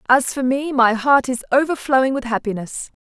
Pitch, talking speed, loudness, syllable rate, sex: 260 Hz, 180 wpm, -18 LUFS, 5.2 syllables/s, female